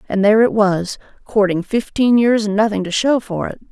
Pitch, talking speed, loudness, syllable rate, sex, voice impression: 210 Hz, 195 wpm, -16 LUFS, 5.3 syllables/s, female, feminine, slightly middle-aged, tensed, powerful, hard, clear, fluent, intellectual, calm, elegant, slightly lively, strict, sharp